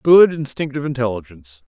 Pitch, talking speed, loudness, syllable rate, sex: 130 Hz, 105 wpm, -17 LUFS, 6.4 syllables/s, male